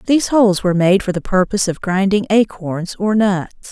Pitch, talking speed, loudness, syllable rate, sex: 195 Hz, 195 wpm, -16 LUFS, 5.6 syllables/s, female